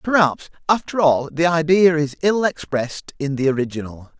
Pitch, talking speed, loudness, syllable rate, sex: 155 Hz, 155 wpm, -19 LUFS, 5.1 syllables/s, male